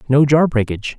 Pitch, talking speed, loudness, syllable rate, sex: 135 Hz, 180 wpm, -15 LUFS, 6.0 syllables/s, male